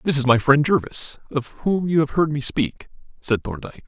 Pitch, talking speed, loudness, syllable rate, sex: 145 Hz, 215 wpm, -20 LUFS, 5.1 syllables/s, male